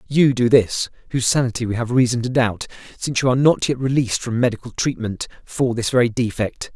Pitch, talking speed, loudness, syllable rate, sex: 120 Hz, 205 wpm, -19 LUFS, 6.1 syllables/s, male